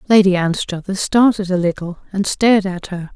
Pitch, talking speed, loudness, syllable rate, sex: 190 Hz, 170 wpm, -17 LUFS, 5.4 syllables/s, female